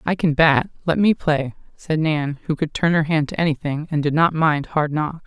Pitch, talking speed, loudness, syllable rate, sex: 155 Hz, 250 wpm, -20 LUFS, 4.9 syllables/s, female